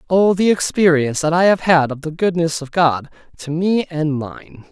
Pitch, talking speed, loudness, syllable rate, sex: 165 Hz, 205 wpm, -17 LUFS, 4.7 syllables/s, male